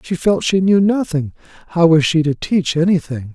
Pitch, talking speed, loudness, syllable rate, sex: 170 Hz, 195 wpm, -16 LUFS, 4.9 syllables/s, male